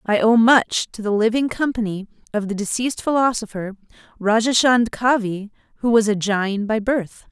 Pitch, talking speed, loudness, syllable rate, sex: 220 Hz, 155 wpm, -19 LUFS, 4.9 syllables/s, female